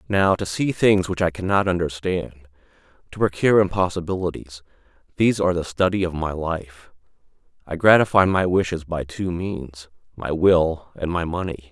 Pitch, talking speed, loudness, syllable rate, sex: 85 Hz, 150 wpm, -21 LUFS, 5.2 syllables/s, male